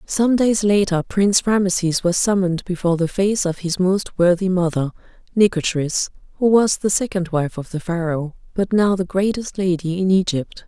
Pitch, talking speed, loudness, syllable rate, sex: 185 Hz, 175 wpm, -19 LUFS, 5.0 syllables/s, female